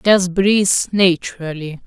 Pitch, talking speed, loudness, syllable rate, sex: 180 Hz, 95 wpm, -16 LUFS, 4.1 syllables/s, female